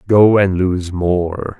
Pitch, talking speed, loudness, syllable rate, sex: 95 Hz, 150 wpm, -15 LUFS, 2.8 syllables/s, male